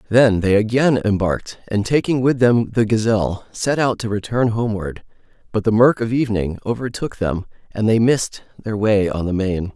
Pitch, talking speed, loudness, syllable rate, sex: 110 Hz, 185 wpm, -19 LUFS, 5.2 syllables/s, male